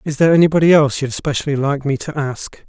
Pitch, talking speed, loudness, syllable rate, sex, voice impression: 145 Hz, 225 wpm, -16 LUFS, 6.8 syllables/s, male, masculine, adult-like, tensed, slightly powerful, slightly dark, slightly raspy, intellectual, sincere, calm, mature, friendly, wild, lively, slightly kind, slightly strict